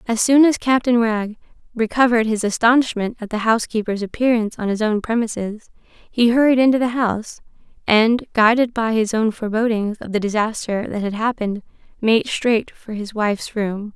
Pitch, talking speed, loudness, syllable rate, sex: 225 Hz, 170 wpm, -19 LUFS, 5.4 syllables/s, female